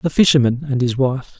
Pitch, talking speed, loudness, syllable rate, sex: 135 Hz, 215 wpm, -17 LUFS, 5.6 syllables/s, male